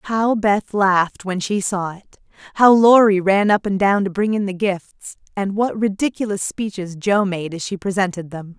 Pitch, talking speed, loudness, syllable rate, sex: 195 Hz, 195 wpm, -18 LUFS, 4.6 syllables/s, female